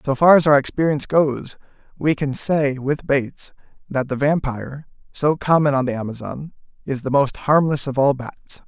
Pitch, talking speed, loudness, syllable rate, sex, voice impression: 140 Hz, 180 wpm, -19 LUFS, 5.0 syllables/s, male, masculine, adult-like, slightly thick, tensed, slightly bright, soft, slightly muffled, intellectual, calm, friendly, reassuring, wild, kind, slightly modest